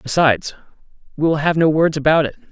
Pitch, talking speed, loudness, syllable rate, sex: 155 Hz, 190 wpm, -17 LUFS, 6.3 syllables/s, male